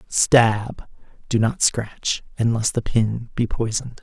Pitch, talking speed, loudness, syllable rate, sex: 115 Hz, 135 wpm, -21 LUFS, 3.7 syllables/s, male